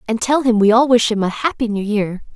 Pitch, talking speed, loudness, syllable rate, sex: 225 Hz, 280 wpm, -16 LUFS, 5.7 syllables/s, female